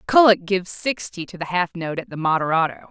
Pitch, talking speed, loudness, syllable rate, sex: 180 Hz, 205 wpm, -21 LUFS, 6.0 syllables/s, female